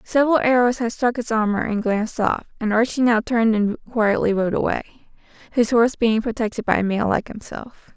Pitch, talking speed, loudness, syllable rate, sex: 225 Hz, 190 wpm, -20 LUFS, 5.5 syllables/s, female